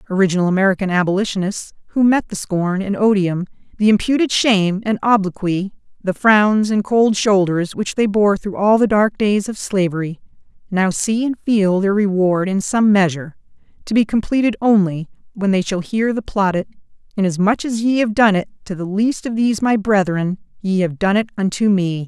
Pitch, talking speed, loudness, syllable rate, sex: 200 Hz, 180 wpm, -17 LUFS, 5.2 syllables/s, female